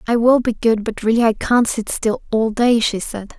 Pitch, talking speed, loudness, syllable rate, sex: 225 Hz, 250 wpm, -17 LUFS, 4.8 syllables/s, female